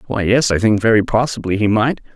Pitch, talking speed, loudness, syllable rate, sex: 110 Hz, 225 wpm, -16 LUFS, 5.8 syllables/s, male